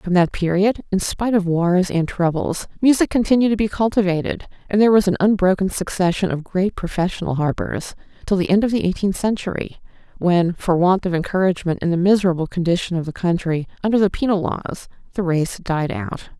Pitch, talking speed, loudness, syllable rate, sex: 185 Hz, 185 wpm, -19 LUFS, 5.7 syllables/s, female